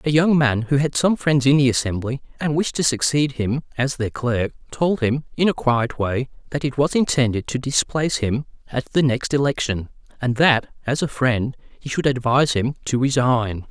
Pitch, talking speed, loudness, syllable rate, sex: 130 Hz, 200 wpm, -20 LUFS, 4.9 syllables/s, male